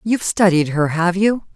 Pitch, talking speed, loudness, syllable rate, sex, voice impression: 185 Hz, 195 wpm, -17 LUFS, 5.0 syllables/s, female, very feminine, very adult-like, slightly middle-aged, thin, slightly tensed, slightly powerful, slightly dark, hard, clear, fluent, slightly raspy, cool, very intellectual, refreshing, sincere, very calm, friendly, reassuring, unique, elegant, slightly wild, lively, slightly strict, slightly intense